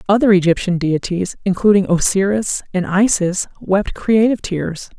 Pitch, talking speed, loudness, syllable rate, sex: 190 Hz, 120 wpm, -16 LUFS, 4.7 syllables/s, female